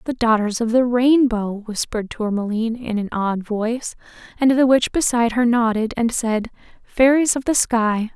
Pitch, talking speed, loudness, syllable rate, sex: 235 Hz, 170 wpm, -19 LUFS, 4.9 syllables/s, female